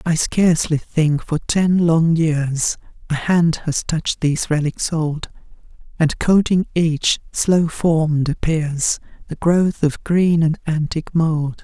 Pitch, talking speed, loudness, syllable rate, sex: 160 Hz, 140 wpm, -18 LUFS, 3.7 syllables/s, female